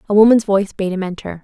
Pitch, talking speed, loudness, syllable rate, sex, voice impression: 200 Hz, 250 wpm, -16 LUFS, 7.6 syllables/s, female, very feminine, young, thin, slightly relaxed, weak, slightly dark, soft, slightly muffled, fluent, slightly raspy, very cute, intellectual, refreshing, slightly sincere, very calm, very friendly, very reassuring, unique, very elegant, wild, very sweet, slightly lively, very kind, slightly intense, slightly modest, light